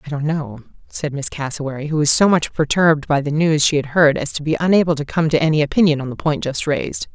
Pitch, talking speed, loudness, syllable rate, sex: 150 Hz, 260 wpm, -18 LUFS, 6.3 syllables/s, female